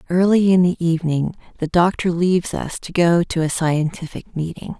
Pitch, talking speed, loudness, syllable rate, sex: 170 Hz, 175 wpm, -19 LUFS, 5.1 syllables/s, female